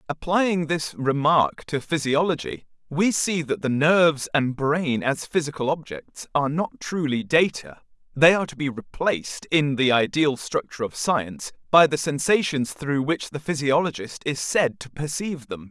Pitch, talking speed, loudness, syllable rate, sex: 150 Hz, 160 wpm, -23 LUFS, 4.7 syllables/s, male